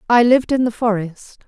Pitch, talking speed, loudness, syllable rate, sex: 230 Hz, 205 wpm, -16 LUFS, 5.5 syllables/s, female